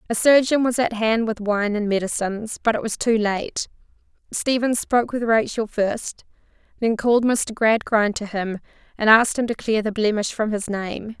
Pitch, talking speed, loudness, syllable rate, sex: 220 Hz, 190 wpm, -21 LUFS, 4.9 syllables/s, female